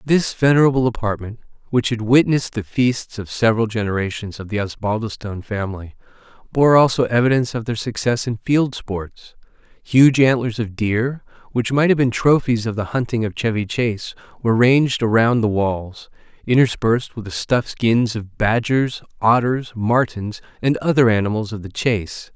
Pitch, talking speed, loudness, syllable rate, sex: 115 Hz, 160 wpm, -19 LUFS, 5.1 syllables/s, male